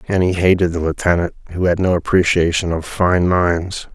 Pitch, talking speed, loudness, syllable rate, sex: 90 Hz, 180 wpm, -17 LUFS, 5.0 syllables/s, male